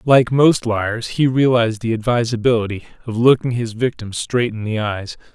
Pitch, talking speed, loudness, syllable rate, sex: 115 Hz, 170 wpm, -18 LUFS, 4.9 syllables/s, male